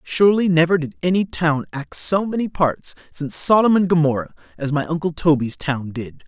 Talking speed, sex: 180 wpm, male